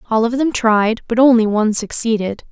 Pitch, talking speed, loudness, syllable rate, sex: 225 Hz, 190 wpm, -15 LUFS, 5.5 syllables/s, female